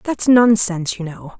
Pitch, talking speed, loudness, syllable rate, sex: 205 Hz, 170 wpm, -15 LUFS, 4.8 syllables/s, female